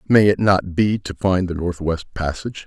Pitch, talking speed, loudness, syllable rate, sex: 95 Hz, 200 wpm, -20 LUFS, 5.0 syllables/s, male